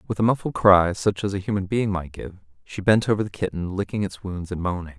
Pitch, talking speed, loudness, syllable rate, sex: 95 Hz, 255 wpm, -23 LUFS, 6.0 syllables/s, male